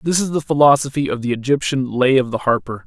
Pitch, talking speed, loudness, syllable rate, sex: 135 Hz, 230 wpm, -17 LUFS, 6.0 syllables/s, male